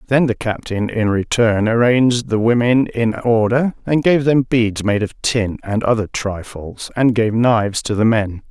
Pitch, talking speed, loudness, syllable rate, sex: 115 Hz, 185 wpm, -17 LUFS, 4.4 syllables/s, male